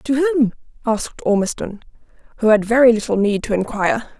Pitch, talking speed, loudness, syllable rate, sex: 230 Hz, 155 wpm, -18 LUFS, 5.8 syllables/s, female